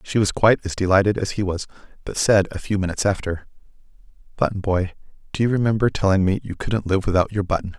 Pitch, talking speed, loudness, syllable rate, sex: 100 Hz, 210 wpm, -21 LUFS, 6.5 syllables/s, male